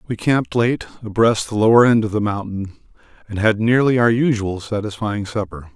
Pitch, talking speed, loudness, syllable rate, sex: 110 Hz, 175 wpm, -18 LUFS, 5.5 syllables/s, male